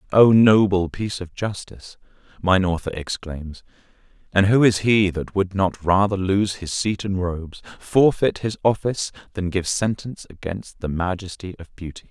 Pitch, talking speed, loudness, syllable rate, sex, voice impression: 95 Hz, 160 wpm, -21 LUFS, 4.8 syllables/s, male, very masculine, adult-like, slightly thick, slightly dark, cool, slightly intellectual, slightly calm